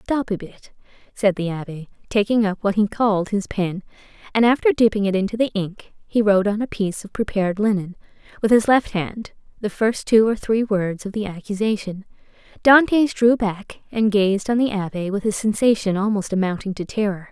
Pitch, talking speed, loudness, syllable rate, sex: 205 Hz, 195 wpm, -20 LUFS, 5.3 syllables/s, female